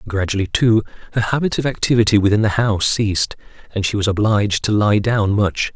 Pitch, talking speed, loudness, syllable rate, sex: 105 Hz, 190 wpm, -17 LUFS, 5.9 syllables/s, male